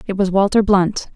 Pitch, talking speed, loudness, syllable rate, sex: 195 Hz, 210 wpm, -16 LUFS, 4.9 syllables/s, female